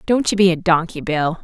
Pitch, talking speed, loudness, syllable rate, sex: 175 Hz, 250 wpm, -17 LUFS, 5.3 syllables/s, female